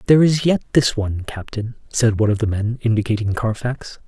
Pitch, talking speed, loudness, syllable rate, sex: 115 Hz, 190 wpm, -19 LUFS, 5.9 syllables/s, male